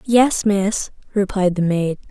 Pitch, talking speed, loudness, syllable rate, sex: 200 Hz, 140 wpm, -19 LUFS, 3.5 syllables/s, female